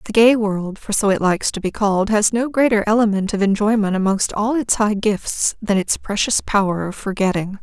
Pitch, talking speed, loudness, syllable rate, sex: 205 Hz, 215 wpm, -18 LUFS, 5.3 syllables/s, female